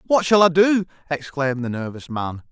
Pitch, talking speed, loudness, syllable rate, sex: 155 Hz, 190 wpm, -20 LUFS, 5.3 syllables/s, male